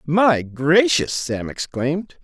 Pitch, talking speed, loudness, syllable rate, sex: 160 Hz, 105 wpm, -19 LUFS, 3.3 syllables/s, male